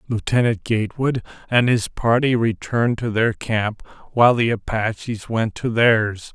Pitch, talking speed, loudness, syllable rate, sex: 115 Hz, 140 wpm, -20 LUFS, 4.5 syllables/s, male